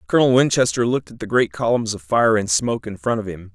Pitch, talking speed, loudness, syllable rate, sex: 110 Hz, 255 wpm, -19 LUFS, 6.5 syllables/s, male